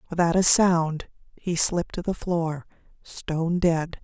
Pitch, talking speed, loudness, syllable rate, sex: 170 Hz, 150 wpm, -23 LUFS, 4.0 syllables/s, female